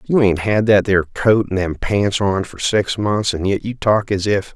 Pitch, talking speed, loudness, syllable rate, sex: 100 Hz, 250 wpm, -17 LUFS, 4.5 syllables/s, male